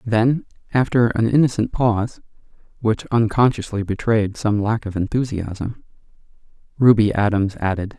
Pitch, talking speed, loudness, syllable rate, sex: 110 Hz, 115 wpm, -19 LUFS, 4.6 syllables/s, male